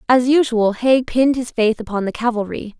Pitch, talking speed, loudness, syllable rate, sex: 235 Hz, 195 wpm, -17 LUFS, 5.4 syllables/s, female